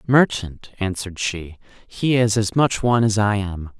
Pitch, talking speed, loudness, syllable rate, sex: 105 Hz, 175 wpm, -20 LUFS, 4.5 syllables/s, male